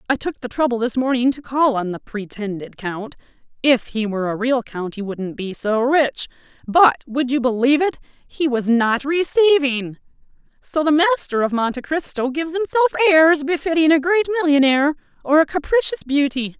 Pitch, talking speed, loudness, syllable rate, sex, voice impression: 275 Hz, 175 wpm, -19 LUFS, 5.2 syllables/s, female, very feminine, very adult-like, slightly middle-aged, very thin, very tensed, very powerful, very bright, very hard, very clear, very fluent, slightly nasal, cool, intellectual, very refreshing, slightly sincere, slightly calm, slightly friendly, slightly reassuring, very unique, slightly elegant, wild, slightly sweet, very lively, very strict, very intense, very sharp, light